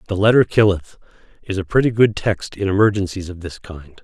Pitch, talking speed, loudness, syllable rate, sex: 100 Hz, 195 wpm, -18 LUFS, 5.6 syllables/s, male